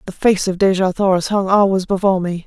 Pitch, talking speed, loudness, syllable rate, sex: 190 Hz, 220 wpm, -16 LUFS, 6.1 syllables/s, female